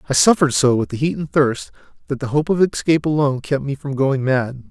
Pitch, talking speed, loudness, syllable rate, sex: 140 Hz, 240 wpm, -18 LUFS, 6.1 syllables/s, male